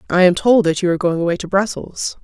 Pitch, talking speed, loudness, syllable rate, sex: 185 Hz, 270 wpm, -16 LUFS, 6.5 syllables/s, female